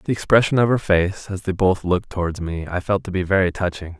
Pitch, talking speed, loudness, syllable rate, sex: 95 Hz, 255 wpm, -20 LUFS, 5.9 syllables/s, male